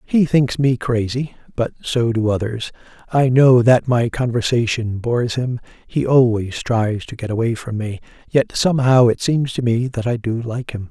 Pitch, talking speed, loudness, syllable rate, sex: 120 Hz, 185 wpm, -18 LUFS, 4.6 syllables/s, male